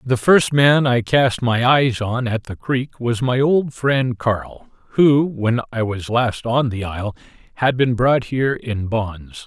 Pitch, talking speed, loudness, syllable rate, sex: 120 Hz, 190 wpm, -18 LUFS, 3.7 syllables/s, male